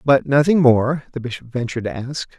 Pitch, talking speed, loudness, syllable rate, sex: 130 Hz, 200 wpm, -19 LUFS, 5.7 syllables/s, male